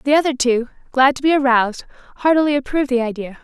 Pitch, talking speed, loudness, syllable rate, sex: 265 Hz, 190 wpm, -17 LUFS, 6.6 syllables/s, female